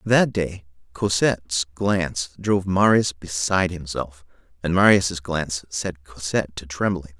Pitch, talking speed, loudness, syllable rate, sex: 85 Hz, 125 wpm, -22 LUFS, 4.6 syllables/s, male